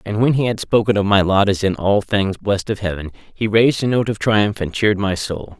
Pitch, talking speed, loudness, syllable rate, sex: 105 Hz, 270 wpm, -18 LUFS, 5.6 syllables/s, male